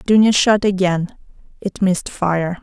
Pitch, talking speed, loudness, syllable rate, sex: 190 Hz, 135 wpm, -17 LUFS, 4.3 syllables/s, female